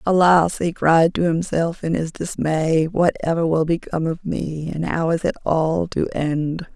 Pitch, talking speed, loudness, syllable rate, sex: 165 Hz, 185 wpm, -20 LUFS, 4.3 syllables/s, female